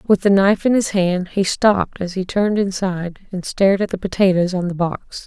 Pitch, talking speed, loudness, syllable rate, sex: 190 Hz, 230 wpm, -18 LUFS, 5.5 syllables/s, female